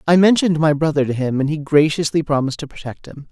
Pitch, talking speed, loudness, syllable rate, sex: 150 Hz, 235 wpm, -17 LUFS, 6.6 syllables/s, male